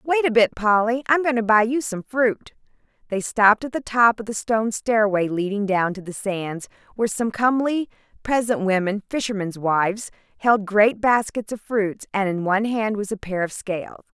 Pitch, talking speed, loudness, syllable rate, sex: 215 Hz, 195 wpm, -21 LUFS, 5.1 syllables/s, female